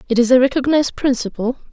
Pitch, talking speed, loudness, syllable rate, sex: 255 Hz, 175 wpm, -16 LUFS, 6.9 syllables/s, female